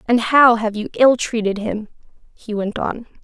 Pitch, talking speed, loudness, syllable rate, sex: 225 Hz, 185 wpm, -17 LUFS, 4.5 syllables/s, female